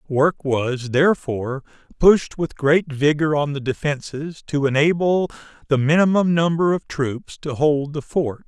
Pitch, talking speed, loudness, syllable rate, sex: 150 Hz, 150 wpm, -20 LUFS, 4.3 syllables/s, male